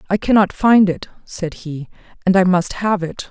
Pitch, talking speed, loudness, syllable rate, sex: 185 Hz, 200 wpm, -16 LUFS, 4.6 syllables/s, female